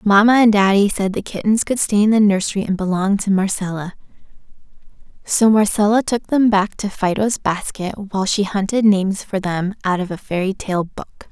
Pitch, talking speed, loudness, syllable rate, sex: 200 Hz, 185 wpm, -17 LUFS, 5.2 syllables/s, female